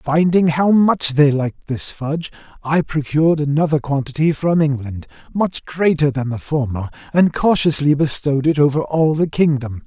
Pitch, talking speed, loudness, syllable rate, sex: 150 Hz, 160 wpm, -17 LUFS, 4.9 syllables/s, male